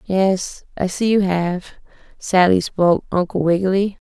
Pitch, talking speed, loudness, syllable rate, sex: 185 Hz, 135 wpm, -18 LUFS, 4.3 syllables/s, female